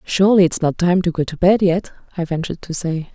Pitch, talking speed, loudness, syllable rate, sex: 175 Hz, 250 wpm, -18 LUFS, 6.1 syllables/s, female